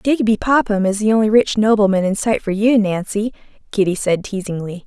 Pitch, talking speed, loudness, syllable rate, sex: 210 Hz, 185 wpm, -17 LUFS, 5.4 syllables/s, female